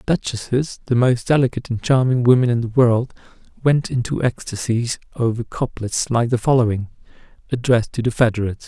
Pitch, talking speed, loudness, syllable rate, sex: 120 Hz, 150 wpm, -19 LUFS, 5.7 syllables/s, male